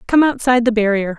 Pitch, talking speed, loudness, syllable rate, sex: 235 Hz, 200 wpm, -15 LUFS, 6.7 syllables/s, female